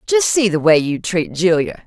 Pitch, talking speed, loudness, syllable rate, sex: 185 Hz, 225 wpm, -16 LUFS, 4.7 syllables/s, female